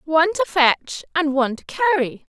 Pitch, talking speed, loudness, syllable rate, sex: 310 Hz, 180 wpm, -20 LUFS, 5.1 syllables/s, female